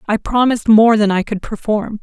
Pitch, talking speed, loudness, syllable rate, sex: 215 Hz, 210 wpm, -14 LUFS, 5.4 syllables/s, female